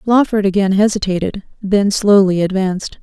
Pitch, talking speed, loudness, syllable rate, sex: 200 Hz, 120 wpm, -15 LUFS, 5.1 syllables/s, female